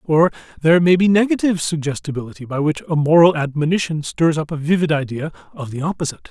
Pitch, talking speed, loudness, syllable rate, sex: 160 Hz, 180 wpm, -18 LUFS, 6.6 syllables/s, male